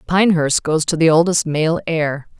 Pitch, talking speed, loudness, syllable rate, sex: 160 Hz, 175 wpm, -16 LUFS, 4.8 syllables/s, female